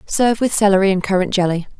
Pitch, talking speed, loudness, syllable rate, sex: 195 Hz, 200 wpm, -16 LUFS, 6.9 syllables/s, female